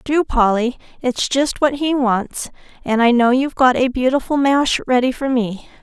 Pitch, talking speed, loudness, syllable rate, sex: 255 Hz, 185 wpm, -17 LUFS, 4.6 syllables/s, female